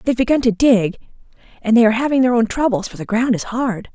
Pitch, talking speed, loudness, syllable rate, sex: 230 Hz, 245 wpm, -17 LUFS, 6.7 syllables/s, female